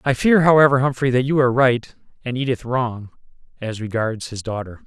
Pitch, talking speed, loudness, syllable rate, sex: 125 Hz, 185 wpm, -19 LUFS, 5.5 syllables/s, male